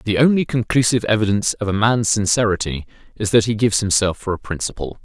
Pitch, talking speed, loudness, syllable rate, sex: 110 Hz, 190 wpm, -18 LUFS, 6.4 syllables/s, male